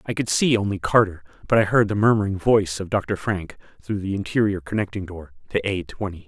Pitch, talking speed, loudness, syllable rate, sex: 100 Hz, 210 wpm, -22 LUFS, 5.8 syllables/s, male